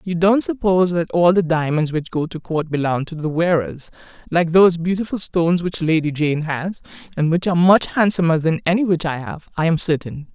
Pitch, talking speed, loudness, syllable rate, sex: 170 Hz, 210 wpm, -18 LUFS, 5.4 syllables/s, female